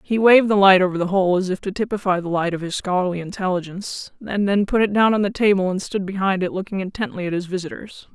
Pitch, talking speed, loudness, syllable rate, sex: 190 Hz, 250 wpm, -20 LUFS, 6.6 syllables/s, female